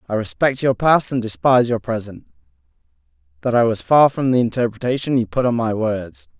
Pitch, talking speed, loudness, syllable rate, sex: 110 Hz, 190 wpm, -18 LUFS, 5.6 syllables/s, male